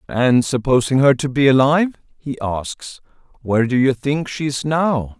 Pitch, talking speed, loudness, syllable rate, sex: 135 Hz, 175 wpm, -17 LUFS, 4.5 syllables/s, male